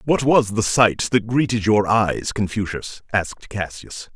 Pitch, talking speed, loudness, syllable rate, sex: 110 Hz, 160 wpm, -20 LUFS, 4.2 syllables/s, male